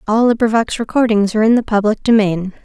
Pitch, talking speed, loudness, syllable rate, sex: 220 Hz, 180 wpm, -14 LUFS, 6.3 syllables/s, female